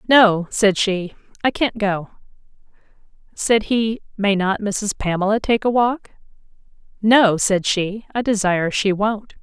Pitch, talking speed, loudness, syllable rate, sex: 205 Hz, 135 wpm, -19 LUFS, 4.0 syllables/s, female